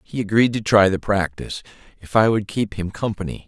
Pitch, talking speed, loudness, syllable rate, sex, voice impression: 105 Hz, 205 wpm, -20 LUFS, 5.7 syllables/s, male, masculine, adult-like, slightly relaxed, bright, fluent, sincere, calm, reassuring, kind, modest